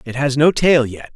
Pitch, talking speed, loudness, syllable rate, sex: 135 Hz, 260 wpm, -16 LUFS, 4.8 syllables/s, male